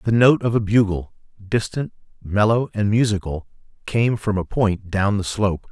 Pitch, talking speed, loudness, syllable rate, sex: 105 Hz, 170 wpm, -20 LUFS, 4.8 syllables/s, male